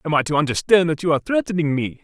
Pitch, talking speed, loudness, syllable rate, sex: 160 Hz, 265 wpm, -19 LUFS, 7.3 syllables/s, male